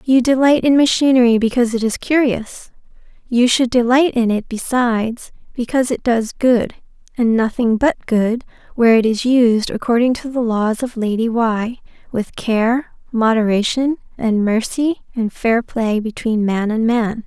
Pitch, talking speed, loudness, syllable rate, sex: 235 Hz, 155 wpm, -16 LUFS, 4.6 syllables/s, female